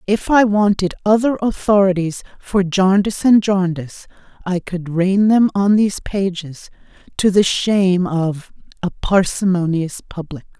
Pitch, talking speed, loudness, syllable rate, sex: 190 Hz, 125 wpm, -16 LUFS, 4.4 syllables/s, female